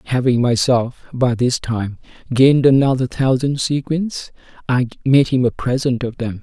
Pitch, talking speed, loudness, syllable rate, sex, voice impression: 125 Hz, 150 wpm, -17 LUFS, 4.5 syllables/s, male, masculine, adult-like, bright, soft, halting, sincere, calm, friendly, kind, modest